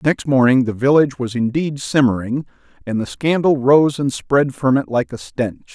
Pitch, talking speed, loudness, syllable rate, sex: 135 Hz, 190 wpm, -17 LUFS, 4.9 syllables/s, male